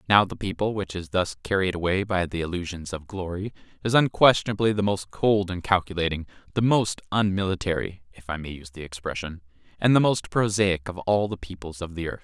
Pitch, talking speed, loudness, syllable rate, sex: 95 Hz, 195 wpm, -25 LUFS, 5.2 syllables/s, male